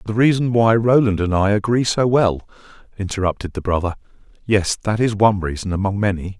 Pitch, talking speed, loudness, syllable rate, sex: 105 Hz, 180 wpm, -18 LUFS, 5.8 syllables/s, male